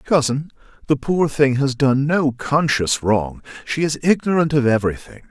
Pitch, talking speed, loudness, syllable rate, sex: 140 Hz, 160 wpm, -18 LUFS, 4.6 syllables/s, male